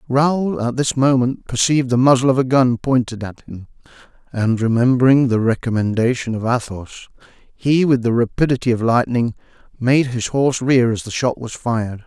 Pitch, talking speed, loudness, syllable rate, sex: 125 Hz, 170 wpm, -17 LUFS, 5.2 syllables/s, male